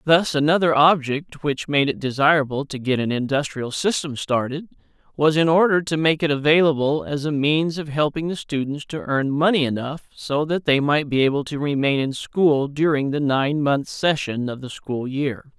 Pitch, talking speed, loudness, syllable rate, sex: 145 Hz, 195 wpm, -21 LUFS, 4.9 syllables/s, male